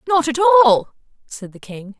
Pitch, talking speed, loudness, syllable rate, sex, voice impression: 280 Hz, 180 wpm, -14 LUFS, 5.0 syllables/s, female, very feminine, slightly young, slightly adult-like, very thin, relaxed, slightly weak, bright, soft, clear, fluent, very cute, slightly intellectual, refreshing, sincere, slightly calm, very friendly, reassuring, unique, elegant, slightly sweet, slightly lively, kind, slightly intense